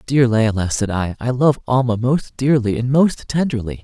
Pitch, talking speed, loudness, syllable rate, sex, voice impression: 120 Hz, 190 wpm, -18 LUFS, 4.8 syllables/s, male, masculine, adult-like, slightly soft, slightly cool, sincere, slightly calm, friendly